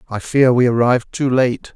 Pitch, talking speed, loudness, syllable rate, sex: 125 Hz, 205 wpm, -16 LUFS, 5.3 syllables/s, male